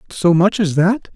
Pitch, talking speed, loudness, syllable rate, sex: 180 Hz, 210 wpm, -15 LUFS, 4.4 syllables/s, male